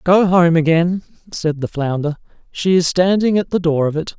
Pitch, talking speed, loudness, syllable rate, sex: 170 Hz, 200 wpm, -16 LUFS, 4.9 syllables/s, male